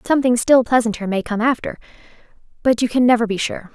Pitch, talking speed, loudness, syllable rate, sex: 235 Hz, 190 wpm, -18 LUFS, 6.5 syllables/s, female